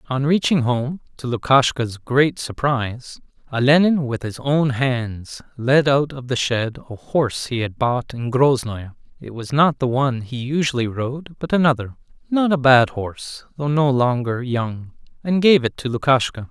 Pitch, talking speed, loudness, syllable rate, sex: 130 Hz, 165 wpm, -19 LUFS, 4.4 syllables/s, male